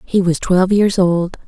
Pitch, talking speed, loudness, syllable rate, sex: 185 Hz, 205 wpm, -15 LUFS, 4.6 syllables/s, female